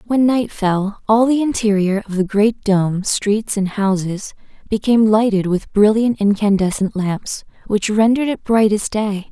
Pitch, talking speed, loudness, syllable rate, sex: 210 Hz, 160 wpm, -17 LUFS, 4.4 syllables/s, female